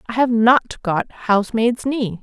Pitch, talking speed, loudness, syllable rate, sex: 230 Hz, 160 wpm, -18 LUFS, 3.8 syllables/s, female